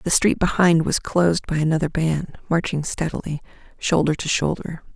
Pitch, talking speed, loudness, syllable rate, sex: 165 Hz, 160 wpm, -21 LUFS, 5.1 syllables/s, female